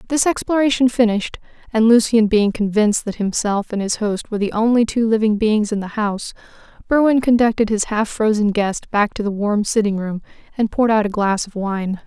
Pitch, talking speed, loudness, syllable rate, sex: 215 Hz, 200 wpm, -18 LUFS, 5.5 syllables/s, female